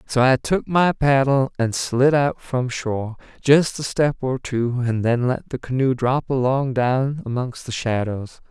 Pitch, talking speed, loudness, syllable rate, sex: 130 Hz, 185 wpm, -20 LUFS, 4.0 syllables/s, male